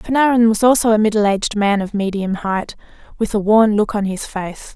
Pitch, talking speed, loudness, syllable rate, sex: 210 Hz, 215 wpm, -16 LUFS, 5.4 syllables/s, female